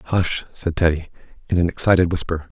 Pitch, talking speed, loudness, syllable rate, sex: 85 Hz, 160 wpm, -20 LUFS, 5.4 syllables/s, male